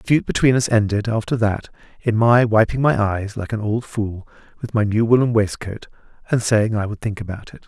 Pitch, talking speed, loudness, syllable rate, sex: 110 Hz, 220 wpm, -19 LUFS, 5.8 syllables/s, male